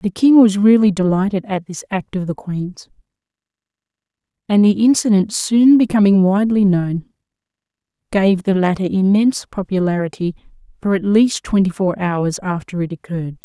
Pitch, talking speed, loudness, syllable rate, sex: 195 Hz, 145 wpm, -16 LUFS, 5.1 syllables/s, female